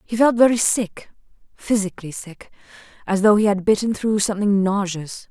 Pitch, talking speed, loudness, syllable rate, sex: 205 Hz, 135 wpm, -19 LUFS, 5.2 syllables/s, female